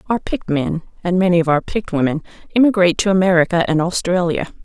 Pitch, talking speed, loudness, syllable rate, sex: 180 Hz, 180 wpm, -17 LUFS, 6.6 syllables/s, female